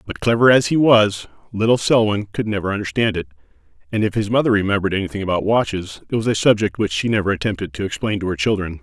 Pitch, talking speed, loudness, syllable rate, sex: 105 Hz, 220 wpm, -18 LUFS, 6.8 syllables/s, male